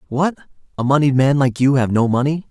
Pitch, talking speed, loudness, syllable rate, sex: 135 Hz, 215 wpm, -17 LUFS, 5.8 syllables/s, male